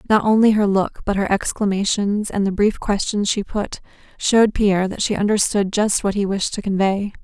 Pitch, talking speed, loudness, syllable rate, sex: 200 Hz, 200 wpm, -19 LUFS, 5.2 syllables/s, female